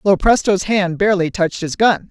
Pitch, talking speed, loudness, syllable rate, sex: 190 Hz, 170 wpm, -16 LUFS, 5.3 syllables/s, female